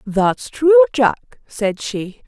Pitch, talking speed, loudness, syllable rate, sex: 235 Hz, 130 wpm, -16 LUFS, 2.7 syllables/s, female